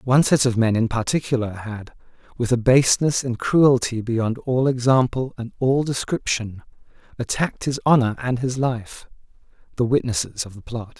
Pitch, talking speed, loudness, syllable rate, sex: 125 Hz, 160 wpm, -21 LUFS, 5.0 syllables/s, male